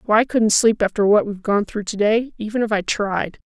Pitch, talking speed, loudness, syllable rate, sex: 210 Hz, 260 wpm, -19 LUFS, 5.6 syllables/s, female